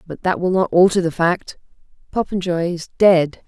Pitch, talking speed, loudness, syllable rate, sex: 175 Hz, 170 wpm, -18 LUFS, 4.7 syllables/s, female